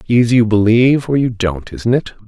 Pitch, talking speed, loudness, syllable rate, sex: 115 Hz, 210 wpm, -14 LUFS, 5.4 syllables/s, male